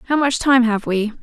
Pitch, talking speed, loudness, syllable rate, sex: 240 Hz, 245 wpm, -17 LUFS, 5.3 syllables/s, female